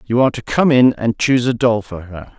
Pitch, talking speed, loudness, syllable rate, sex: 115 Hz, 275 wpm, -15 LUFS, 5.8 syllables/s, male